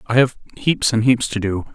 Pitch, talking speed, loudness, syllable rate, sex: 120 Hz, 240 wpm, -19 LUFS, 5.2 syllables/s, male